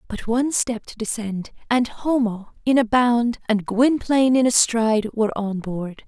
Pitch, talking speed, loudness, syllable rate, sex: 230 Hz, 180 wpm, -21 LUFS, 4.6 syllables/s, female